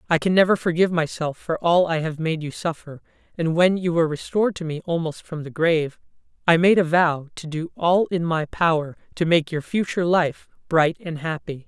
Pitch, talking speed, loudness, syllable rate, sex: 170 Hz, 210 wpm, -22 LUFS, 5.4 syllables/s, female